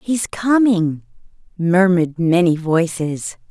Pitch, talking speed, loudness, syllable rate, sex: 180 Hz, 85 wpm, -17 LUFS, 3.6 syllables/s, female